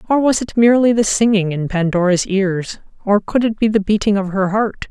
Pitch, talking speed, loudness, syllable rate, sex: 205 Hz, 220 wpm, -16 LUFS, 5.4 syllables/s, female